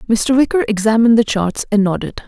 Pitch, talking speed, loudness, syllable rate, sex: 220 Hz, 185 wpm, -15 LUFS, 5.9 syllables/s, female